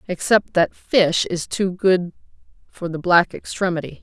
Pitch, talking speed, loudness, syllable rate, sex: 180 Hz, 150 wpm, -19 LUFS, 4.3 syllables/s, female